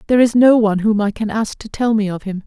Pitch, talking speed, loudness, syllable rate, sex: 215 Hz, 315 wpm, -16 LUFS, 6.6 syllables/s, female